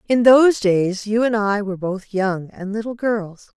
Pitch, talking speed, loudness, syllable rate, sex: 210 Hz, 200 wpm, -19 LUFS, 4.5 syllables/s, female